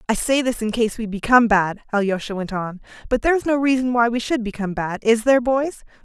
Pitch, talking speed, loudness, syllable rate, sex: 230 Hz, 230 wpm, -20 LUFS, 6.2 syllables/s, female